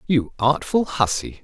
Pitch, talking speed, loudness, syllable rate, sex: 140 Hz, 125 wpm, -21 LUFS, 4.1 syllables/s, male